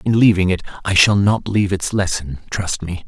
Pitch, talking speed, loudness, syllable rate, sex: 95 Hz, 215 wpm, -17 LUFS, 5.3 syllables/s, male